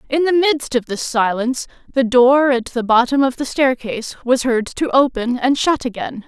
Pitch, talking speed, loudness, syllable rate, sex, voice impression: 255 Hz, 200 wpm, -17 LUFS, 4.8 syllables/s, female, very feminine, slightly powerful, slightly clear, intellectual, slightly strict